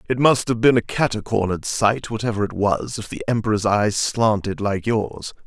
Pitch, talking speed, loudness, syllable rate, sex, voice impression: 110 Hz, 185 wpm, -20 LUFS, 5.1 syllables/s, male, masculine, adult-like, slightly thick, slightly powerful, slightly fluent, unique, slightly lively